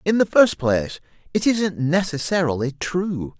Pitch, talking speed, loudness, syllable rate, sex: 165 Hz, 140 wpm, -20 LUFS, 4.5 syllables/s, male